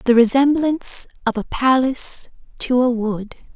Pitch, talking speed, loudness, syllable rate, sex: 250 Hz, 135 wpm, -18 LUFS, 4.7 syllables/s, female